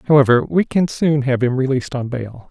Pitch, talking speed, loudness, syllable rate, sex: 135 Hz, 215 wpm, -17 LUFS, 5.3 syllables/s, male